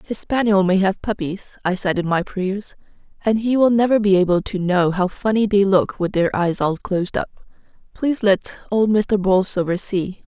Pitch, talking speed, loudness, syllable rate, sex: 195 Hz, 200 wpm, -19 LUFS, 5.0 syllables/s, female